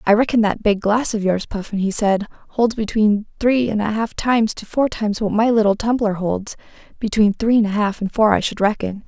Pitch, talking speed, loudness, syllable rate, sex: 215 Hz, 230 wpm, -19 LUFS, 5.4 syllables/s, female